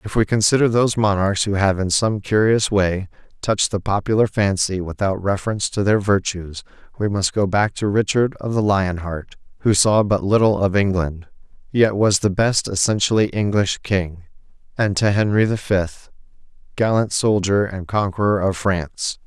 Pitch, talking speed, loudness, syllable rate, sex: 100 Hz, 170 wpm, -19 LUFS, 4.9 syllables/s, male